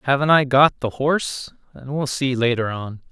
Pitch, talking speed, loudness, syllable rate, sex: 135 Hz, 195 wpm, -19 LUFS, 4.9 syllables/s, male